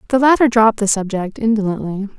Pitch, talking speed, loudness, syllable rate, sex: 215 Hz, 165 wpm, -16 LUFS, 6.2 syllables/s, female